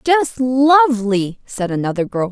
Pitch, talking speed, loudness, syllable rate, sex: 235 Hz, 130 wpm, -16 LUFS, 4.2 syllables/s, female